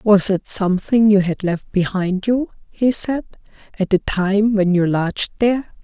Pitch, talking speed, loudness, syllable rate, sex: 200 Hz, 175 wpm, -18 LUFS, 4.5 syllables/s, female